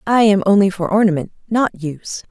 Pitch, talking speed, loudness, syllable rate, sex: 195 Hz, 180 wpm, -16 LUFS, 5.6 syllables/s, female